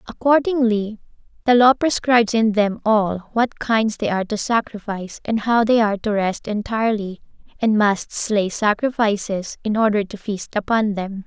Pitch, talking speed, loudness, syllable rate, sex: 215 Hz, 160 wpm, -19 LUFS, 4.7 syllables/s, female